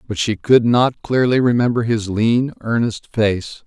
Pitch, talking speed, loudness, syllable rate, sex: 115 Hz, 165 wpm, -17 LUFS, 4.1 syllables/s, male